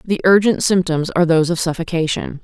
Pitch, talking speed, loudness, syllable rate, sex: 170 Hz, 170 wpm, -16 LUFS, 6.1 syllables/s, female